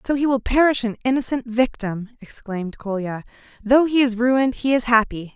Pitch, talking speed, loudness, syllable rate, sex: 240 Hz, 180 wpm, -20 LUFS, 5.4 syllables/s, female